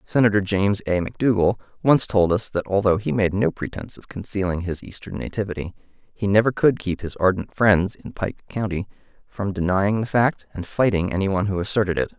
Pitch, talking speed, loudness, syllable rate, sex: 100 Hz, 190 wpm, -22 LUFS, 5.7 syllables/s, male